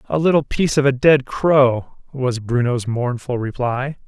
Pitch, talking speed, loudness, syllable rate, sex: 130 Hz, 160 wpm, -18 LUFS, 4.3 syllables/s, male